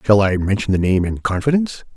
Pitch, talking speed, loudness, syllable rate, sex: 105 Hz, 215 wpm, -18 LUFS, 6.3 syllables/s, male